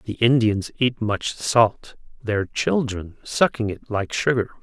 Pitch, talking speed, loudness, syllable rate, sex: 110 Hz, 145 wpm, -22 LUFS, 3.6 syllables/s, male